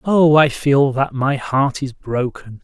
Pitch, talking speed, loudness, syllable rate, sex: 140 Hz, 180 wpm, -17 LUFS, 3.6 syllables/s, male